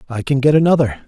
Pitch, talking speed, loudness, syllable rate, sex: 140 Hz, 225 wpm, -15 LUFS, 7.1 syllables/s, male